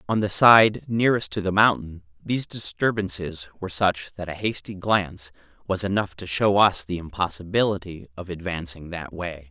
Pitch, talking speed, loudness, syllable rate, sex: 90 Hz, 165 wpm, -23 LUFS, 5.1 syllables/s, male